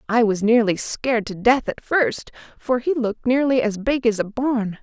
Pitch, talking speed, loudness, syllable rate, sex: 235 Hz, 210 wpm, -20 LUFS, 4.8 syllables/s, female